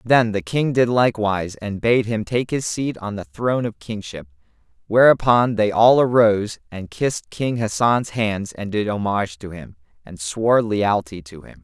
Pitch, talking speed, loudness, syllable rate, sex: 110 Hz, 180 wpm, -20 LUFS, 4.7 syllables/s, male